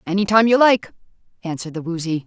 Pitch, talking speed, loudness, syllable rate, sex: 190 Hz, 185 wpm, -18 LUFS, 6.7 syllables/s, female